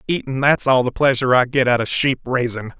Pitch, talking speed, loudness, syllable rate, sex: 130 Hz, 215 wpm, -17 LUFS, 5.9 syllables/s, male